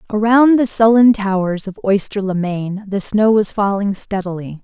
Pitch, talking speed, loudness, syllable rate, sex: 205 Hz, 170 wpm, -16 LUFS, 4.6 syllables/s, female